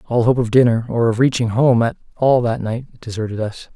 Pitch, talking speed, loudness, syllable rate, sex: 120 Hz, 225 wpm, -17 LUFS, 5.3 syllables/s, male